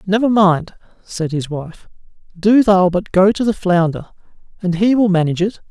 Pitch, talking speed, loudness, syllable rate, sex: 190 Hz, 180 wpm, -15 LUFS, 4.9 syllables/s, male